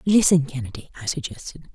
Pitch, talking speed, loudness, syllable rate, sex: 155 Hz, 140 wpm, -22 LUFS, 6.3 syllables/s, female